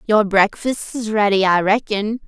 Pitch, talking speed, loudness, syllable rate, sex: 210 Hz, 130 wpm, -17 LUFS, 3.9 syllables/s, female